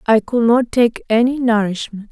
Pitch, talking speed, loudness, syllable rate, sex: 230 Hz, 170 wpm, -16 LUFS, 4.7 syllables/s, female